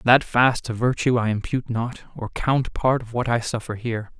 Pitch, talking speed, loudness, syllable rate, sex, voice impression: 120 Hz, 215 wpm, -22 LUFS, 5.1 syllables/s, male, masculine, slightly thin, slightly hard, clear, fluent, slightly refreshing, calm, friendly, slightly unique, lively, slightly strict